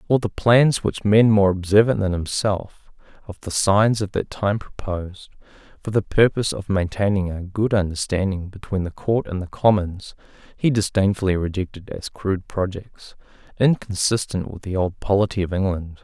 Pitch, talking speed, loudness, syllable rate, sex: 100 Hz, 160 wpm, -21 LUFS, 5.0 syllables/s, male